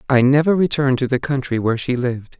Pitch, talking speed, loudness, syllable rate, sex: 130 Hz, 225 wpm, -18 LUFS, 6.8 syllables/s, male